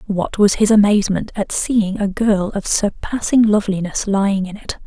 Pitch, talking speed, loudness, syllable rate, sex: 200 Hz, 175 wpm, -17 LUFS, 5.0 syllables/s, female